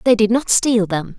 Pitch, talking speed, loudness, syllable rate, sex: 215 Hz, 255 wpm, -16 LUFS, 4.7 syllables/s, female